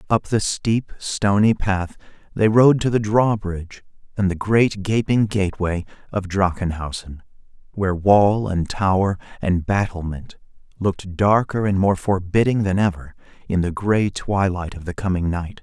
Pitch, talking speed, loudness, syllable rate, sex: 95 Hz, 145 wpm, -20 LUFS, 4.5 syllables/s, male